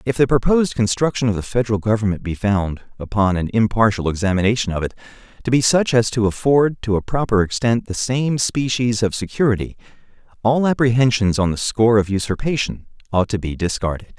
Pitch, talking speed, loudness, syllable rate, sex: 110 Hz, 180 wpm, -19 LUFS, 5.9 syllables/s, male